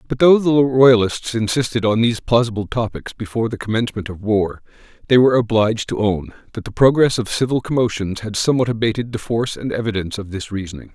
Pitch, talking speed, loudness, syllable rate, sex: 115 Hz, 190 wpm, -18 LUFS, 6.4 syllables/s, male